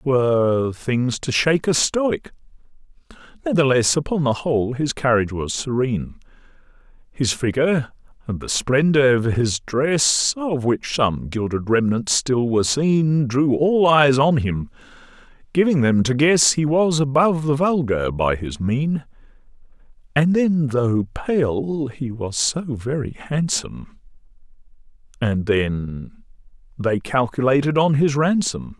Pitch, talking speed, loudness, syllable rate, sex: 135 Hz, 130 wpm, -19 LUFS, 4.0 syllables/s, male